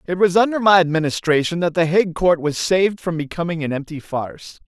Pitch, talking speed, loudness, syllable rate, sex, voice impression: 170 Hz, 205 wpm, -18 LUFS, 6.0 syllables/s, male, masculine, adult-like, slightly bright, clear, slightly refreshing, slightly friendly, slightly unique, slightly lively